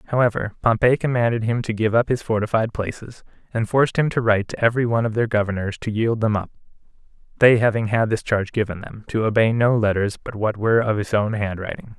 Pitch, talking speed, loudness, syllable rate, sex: 110 Hz, 220 wpm, -21 LUFS, 6.2 syllables/s, male